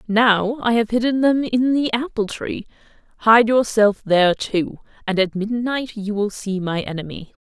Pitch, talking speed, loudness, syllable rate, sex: 220 Hz, 170 wpm, -19 LUFS, 4.4 syllables/s, female